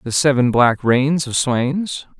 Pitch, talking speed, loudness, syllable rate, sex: 135 Hz, 165 wpm, -17 LUFS, 3.5 syllables/s, male